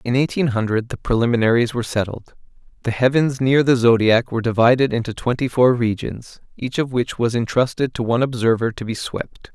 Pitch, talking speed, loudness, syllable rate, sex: 120 Hz, 180 wpm, -19 LUFS, 5.7 syllables/s, male